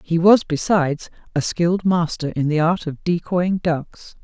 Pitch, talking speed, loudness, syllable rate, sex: 170 Hz, 170 wpm, -20 LUFS, 4.4 syllables/s, female